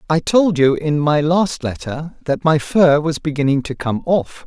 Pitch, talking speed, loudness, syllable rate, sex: 155 Hz, 200 wpm, -17 LUFS, 4.3 syllables/s, male